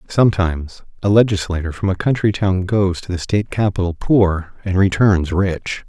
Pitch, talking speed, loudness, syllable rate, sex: 95 Hz, 165 wpm, -17 LUFS, 5.0 syllables/s, male